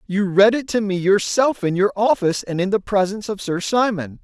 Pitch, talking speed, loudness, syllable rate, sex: 200 Hz, 225 wpm, -19 LUFS, 5.4 syllables/s, male